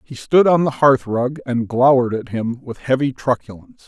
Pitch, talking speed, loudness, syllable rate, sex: 130 Hz, 200 wpm, -17 LUFS, 5.2 syllables/s, male